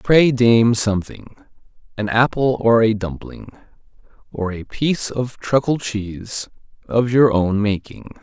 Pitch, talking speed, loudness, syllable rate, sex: 115 Hz, 130 wpm, -18 LUFS, 4.0 syllables/s, male